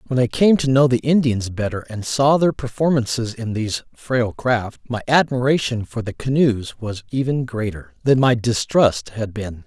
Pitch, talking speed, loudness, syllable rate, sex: 120 Hz, 180 wpm, -20 LUFS, 4.6 syllables/s, male